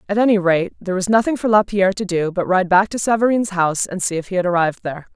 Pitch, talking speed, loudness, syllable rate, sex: 195 Hz, 270 wpm, -18 LUFS, 7.0 syllables/s, female